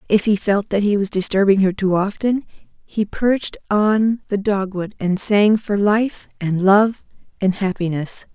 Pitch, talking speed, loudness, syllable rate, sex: 200 Hz, 165 wpm, -18 LUFS, 4.3 syllables/s, female